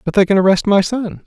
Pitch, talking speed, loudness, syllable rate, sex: 200 Hz, 285 wpm, -14 LUFS, 6.2 syllables/s, male